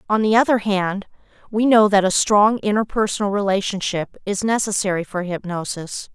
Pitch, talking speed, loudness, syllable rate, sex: 205 Hz, 145 wpm, -19 LUFS, 5.1 syllables/s, female